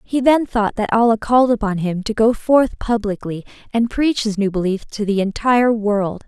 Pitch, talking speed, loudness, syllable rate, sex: 220 Hz, 200 wpm, -18 LUFS, 4.9 syllables/s, female